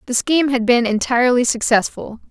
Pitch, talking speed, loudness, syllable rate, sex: 245 Hz, 155 wpm, -16 LUFS, 5.8 syllables/s, female